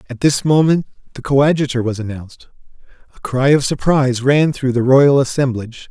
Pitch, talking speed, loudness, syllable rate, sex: 135 Hz, 165 wpm, -15 LUFS, 5.7 syllables/s, male